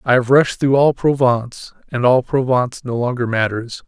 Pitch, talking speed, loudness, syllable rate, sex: 125 Hz, 170 wpm, -17 LUFS, 5.0 syllables/s, male